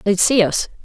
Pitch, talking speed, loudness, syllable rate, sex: 205 Hz, 215 wpm, -16 LUFS, 5.0 syllables/s, female